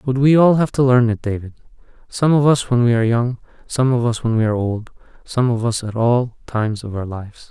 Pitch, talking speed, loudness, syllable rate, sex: 120 Hz, 250 wpm, -18 LUFS, 5.8 syllables/s, male